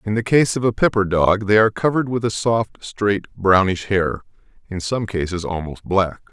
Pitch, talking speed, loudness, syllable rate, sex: 100 Hz, 200 wpm, -19 LUFS, 4.3 syllables/s, male